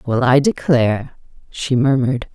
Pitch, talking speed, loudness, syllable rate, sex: 130 Hz, 130 wpm, -17 LUFS, 4.7 syllables/s, female